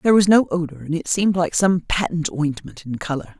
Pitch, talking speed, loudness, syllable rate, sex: 170 Hz, 230 wpm, -20 LUFS, 5.9 syllables/s, female